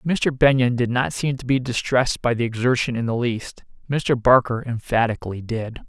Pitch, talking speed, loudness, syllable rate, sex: 120 Hz, 185 wpm, -21 LUFS, 5.1 syllables/s, male